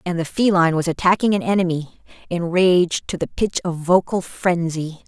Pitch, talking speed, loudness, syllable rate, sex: 175 Hz, 165 wpm, -19 LUFS, 5.5 syllables/s, female